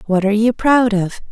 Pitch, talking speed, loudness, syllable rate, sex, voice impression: 215 Hz, 230 wpm, -15 LUFS, 5.6 syllables/s, female, very feminine, slightly young, intellectual, elegant, kind